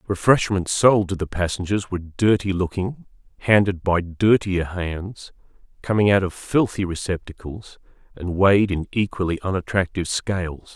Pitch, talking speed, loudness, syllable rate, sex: 95 Hz, 130 wpm, -21 LUFS, 4.8 syllables/s, male